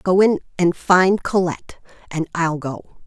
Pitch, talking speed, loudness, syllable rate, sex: 175 Hz, 155 wpm, -19 LUFS, 4.3 syllables/s, female